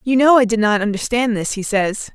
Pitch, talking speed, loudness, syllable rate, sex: 225 Hz, 250 wpm, -17 LUFS, 5.5 syllables/s, female